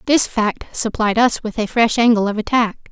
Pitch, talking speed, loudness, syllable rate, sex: 225 Hz, 205 wpm, -17 LUFS, 4.9 syllables/s, female